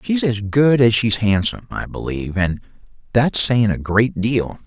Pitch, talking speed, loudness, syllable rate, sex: 110 Hz, 180 wpm, -18 LUFS, 4.6 syllables/s, male